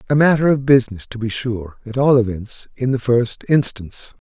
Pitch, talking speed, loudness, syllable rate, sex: 125 Hz, 185 wpm, -18 LUFS, 5.3 syllables/s, male